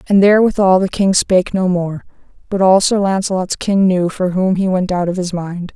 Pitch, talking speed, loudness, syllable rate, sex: 185 Hz, 220 wpm, -15 LUFS, 5.3 syllables/s, female